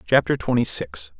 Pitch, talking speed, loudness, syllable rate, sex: 105 Hz, 150 wpm, -22 LUFS, 4.9 syllables/s, male